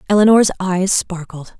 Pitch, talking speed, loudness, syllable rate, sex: 190 Hz, 115 wpm, -14 LUFS, 4.5 syllables/s, female